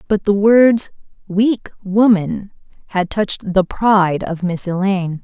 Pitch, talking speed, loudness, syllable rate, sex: 200 Hz, 140 wpm, -16 LUFS, 4.1 syllables/s, female